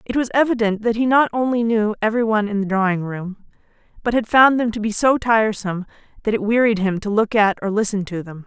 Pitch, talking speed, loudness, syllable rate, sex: 215 Hz, 225 wpm, -19 LUFS, 6.0 syllables/s, female